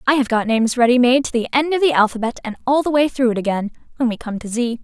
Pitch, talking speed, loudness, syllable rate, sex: 245 Hz, 300 wpm, -18 LUFS, 6.9 syllables/s, female